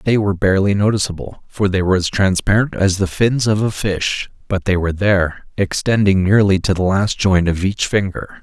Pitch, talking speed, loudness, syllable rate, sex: 100 Hz, 200 wpm, -17 LUFS, 5.4 syllables/s, male